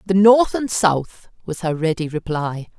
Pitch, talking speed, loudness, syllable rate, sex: 180 Hz, 170 wpm, -19 LUFS, 4.2 syllables/s, female